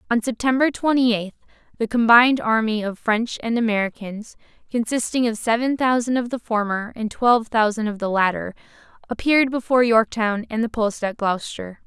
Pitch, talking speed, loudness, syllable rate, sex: 230 Hz, 160 wpm, -20 LUFS, 5.5 syllables/s, female